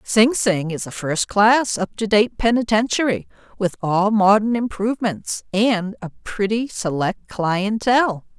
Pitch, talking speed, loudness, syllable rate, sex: 210 Hz, 115 wpm, -19 LUFS, 4.2 syllables/s, female